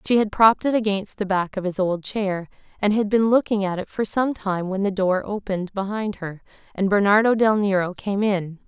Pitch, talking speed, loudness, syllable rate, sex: 200 Hz, 220 wpm, -22 LUFS, 5.3 syllables/s, female